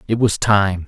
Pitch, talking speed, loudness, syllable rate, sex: 100 Hz, 205 wpm, -16 LUFS, 4.2 syllables/s, male